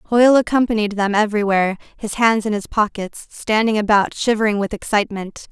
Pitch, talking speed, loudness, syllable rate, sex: 215 Hz, 150 wpm, -18 LUFS, 5.8 syllables/s, female